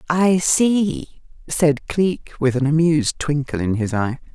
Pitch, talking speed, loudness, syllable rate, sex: 150 Hz, 150 wpm, -19 LUFS, 3.9 syllables/s, female